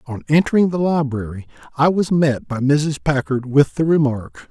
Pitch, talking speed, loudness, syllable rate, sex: 140 Hz, 175 wpm, -18 LUFS, 4.7 syllables/s, male